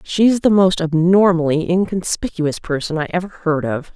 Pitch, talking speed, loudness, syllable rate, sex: 170 Hz, 150 wpm, -17 LUFS, 4.7 syllables/s, female